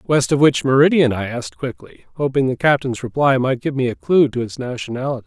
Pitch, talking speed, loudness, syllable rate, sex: 135 Hz, 215 wpm, -18 LUFS, 5.9 syllables/s, male